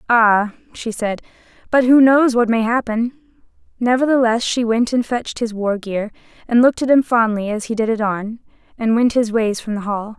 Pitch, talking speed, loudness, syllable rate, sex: 230 Hz, 200 wpm, -17 LUFS, 5.2 syllables/s, female